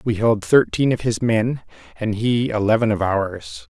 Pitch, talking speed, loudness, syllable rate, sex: 110 Hz, 175 wpm, -19 LUFS, 4.3 syllables/s, male